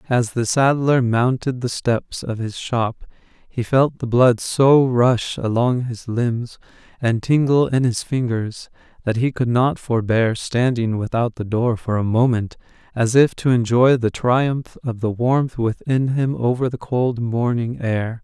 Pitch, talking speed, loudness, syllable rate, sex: 120 Hz, 170 wpm, -19 LUFS, 3.9 syllables/s, male